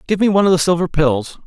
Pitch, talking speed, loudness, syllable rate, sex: 170 Hz, 285 wpm, -15 LUFS, 7.1 syllables/s, male